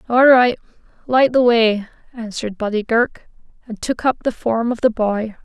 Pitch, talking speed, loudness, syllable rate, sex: 230 Hz, 175 wpm, -17 LUFS, 5.0 syllables/s, female